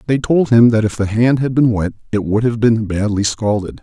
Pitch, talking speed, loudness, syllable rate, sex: 115 Hz, 250 wpm, -15 LUFS, 5.2 syllables/s, male